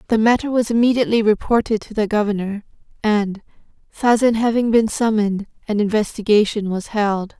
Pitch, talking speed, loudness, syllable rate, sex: 215 Hz, 140 wpm, -18 LUFS, 5.6 syllables/s, female